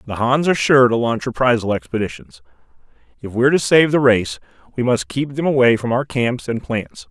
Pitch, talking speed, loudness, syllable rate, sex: 120 Hz, 205 wpm, -17 LUFS, 5.5 syllables/s, male